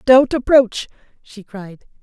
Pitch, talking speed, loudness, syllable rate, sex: 235 Hz, 120 wpm, -14 LUFS, 3.5 syllables/s, female